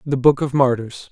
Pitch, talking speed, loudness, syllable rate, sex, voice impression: 130 Hz, 215 wpm, -18 LUFS, 5.0 syllables/s, male, masculine, adult-like, bright, soft, slightly raspy, slightly cool, refreshing, friendly, reassuring, kind